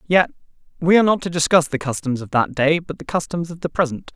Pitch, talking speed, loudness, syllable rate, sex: 160 Hz, 245 wpm, -19 LUFS, 6.3 syllables/s, male